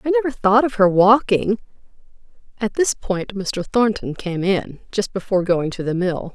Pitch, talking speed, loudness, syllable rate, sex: 205 Hz, 180 wpm, -19 LUFS, 4.7 syllables/s, female